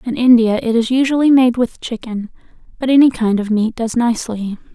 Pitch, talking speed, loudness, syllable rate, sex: 235 Hz, 190 wpm, -15 LUFS, 5.5 syllables/s, female